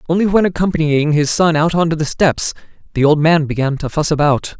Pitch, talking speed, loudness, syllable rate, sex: 155 Hz, 220 wpm, -15 LUFS, 5.8 syllables/s, male